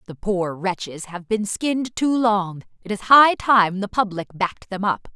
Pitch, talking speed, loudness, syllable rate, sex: 205 Hz, 200 wpm, -20 LUFS, 4.4 syllables/s, female